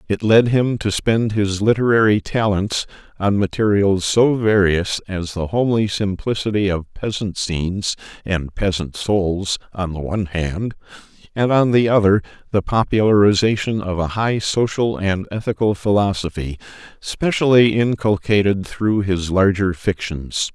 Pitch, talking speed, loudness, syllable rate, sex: 100 Hz, 130 wpm, -18 LUFS, 4.4 syllables/s, male